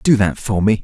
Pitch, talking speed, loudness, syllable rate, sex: 105 Hz, 290 wpm, -17 LUFS, 5.1 syllables/s, male